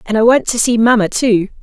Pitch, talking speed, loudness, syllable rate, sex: 225 Hz, 260 wpm, -13 LUFS, 5.7 syllables/s, female